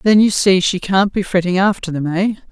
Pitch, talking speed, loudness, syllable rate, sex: 190 Hz, 240 wpm, -15 LUFS, 5.3 syllables/s, female